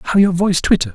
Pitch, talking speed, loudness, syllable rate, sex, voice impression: 180 Hz, 255 wpm, -15 LUFS, 6.6 syllables/s, male, masculine, adult-like, relaxed, slightly dark, slightly muffled, raspy, sincere, calm, slightly mature, slightly wild, kind, modest